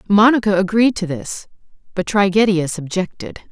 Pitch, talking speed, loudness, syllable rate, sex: 195 Hz, 120 wpm, -17 LUFS, 5.0 syllables/s, female